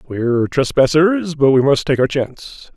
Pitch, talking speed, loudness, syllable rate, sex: 140 Hz, 175 wpm, -15 LUFS, 4.7 syllables/s, male